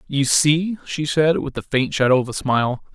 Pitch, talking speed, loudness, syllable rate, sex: 145 Hz, 225 wpm, -19 LUFS, 5.0 syllables/s, male